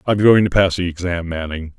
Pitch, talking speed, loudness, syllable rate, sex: 90 Hz, 235 wpm, -17 LUFS, 5.5 syllables/s, male